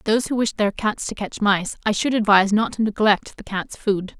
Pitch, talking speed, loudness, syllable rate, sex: 210 Hz, 245 wpm, -21 LUFS, 5.3 syllables/s, female